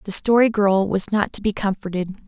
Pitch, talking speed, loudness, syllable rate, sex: 200 Hz, 210 wpm, -20 LUFS, 5.3 syllables/s, female